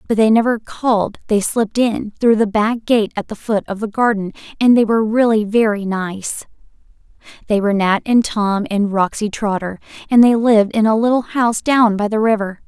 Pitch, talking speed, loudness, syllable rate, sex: 215 Hz, 200 wpm, -16 LUFS, 5.3 syllables/s, female